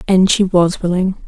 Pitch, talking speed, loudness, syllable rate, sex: 185 Hz, 190 wpm, -14 LUFS, 4.8 syllables/s, female